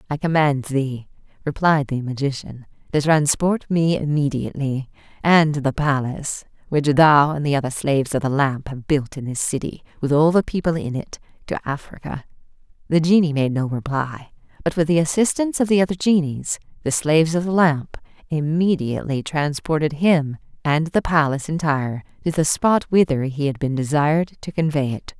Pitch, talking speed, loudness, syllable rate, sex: 150 Hz, 170 wpm, -20 LUFS, 5.2 syllables/s, female